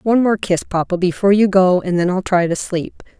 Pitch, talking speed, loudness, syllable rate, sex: 190 Hz, 245 wpm, -16 LUFS, 5.7 syllables/s, female